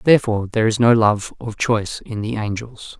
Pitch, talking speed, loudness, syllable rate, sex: 110 Hz, 200 wpm, -19 LUFS, 5.6 syllables/s, male